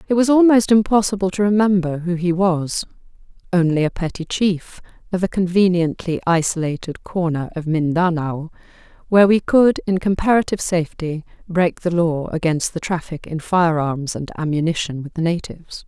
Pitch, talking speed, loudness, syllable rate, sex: 175 Hz, 145 wpm, -19 LUFS, 5.2 syllables/s, female